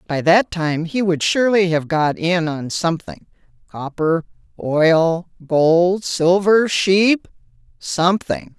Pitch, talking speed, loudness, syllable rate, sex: 175 Hz, 110 wpm, -17 LUFS, 3.6 syllables/s, female